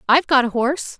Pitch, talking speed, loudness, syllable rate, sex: 270 Hz, 240 wpm, -18 LUFS, 7.2 syllables/s, female